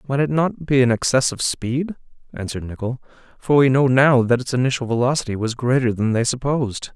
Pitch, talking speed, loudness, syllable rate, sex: 125 Hz, 200 wpm, -19 LUFS, 5.8 syllables/s, male